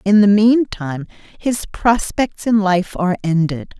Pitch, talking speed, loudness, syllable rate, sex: 200 Hz, 140 wpm, -17 LUFS, 4.4 syllables/s, female